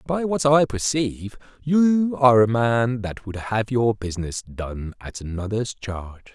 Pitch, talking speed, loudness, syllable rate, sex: 120 Hz, 160 wpm, -22 LUFS, 4.9 syllables/s, male